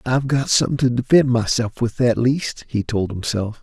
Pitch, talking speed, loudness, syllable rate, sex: 120 Hz, 200 wpm, -19 LUFS, 5.1 syllables/s, male